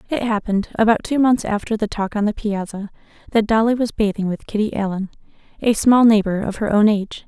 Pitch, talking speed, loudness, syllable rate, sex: 215 Hz, 205 wpm, -19 LUFS, 5.9 syllables/s, female